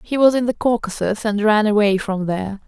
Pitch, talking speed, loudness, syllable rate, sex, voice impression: 215 Hz, 225 wpm, -18 LUFS, 5.5 syllables/s, female, feminine, adult-like, slightly tensed, powerful, bright, soft, fluent, slightly raspy, calm, friendly, reassuring, elegant, lively, kind